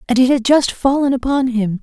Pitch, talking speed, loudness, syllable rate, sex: 255 Hz, 230 wpm, -15 LUFS, 5.4 syllables/s, female